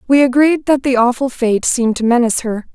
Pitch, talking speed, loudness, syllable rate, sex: 250 Hz, 220 wpm, -14 LUFS, 5.9 syllables/s, female